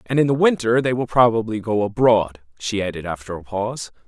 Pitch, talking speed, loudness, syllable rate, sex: 115 Hz, 205 wpm, -20 LUFS, 5.7 syllables/s, male